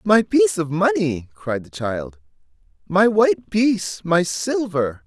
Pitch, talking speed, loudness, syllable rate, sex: 160 Hz, 140 wpm, -20 LUFS, 4.0 syllables/s, male